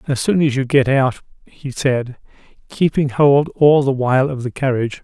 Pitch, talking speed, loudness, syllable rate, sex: 135 Hz, 190 wpm, -16 LUFS, 4.9 syllables/s, male